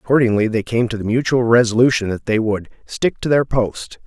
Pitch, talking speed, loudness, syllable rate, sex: 115 Hz, 205 wpm, -17 LUFS, 5.6 syllables/s, male